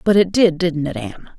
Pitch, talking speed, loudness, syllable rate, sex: 170 Hz, 260 wpm, -17 LUFS, 5.8 syllables/s, female